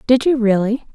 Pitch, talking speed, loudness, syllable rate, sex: 240 Hz, 190 wpm, -16 LUFS, 5.3 syllables/s, female